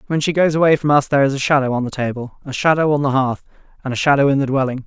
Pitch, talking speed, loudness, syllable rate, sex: 140 Hz, 295 wpm, -17 LUFS, 7.4 syllables/s, male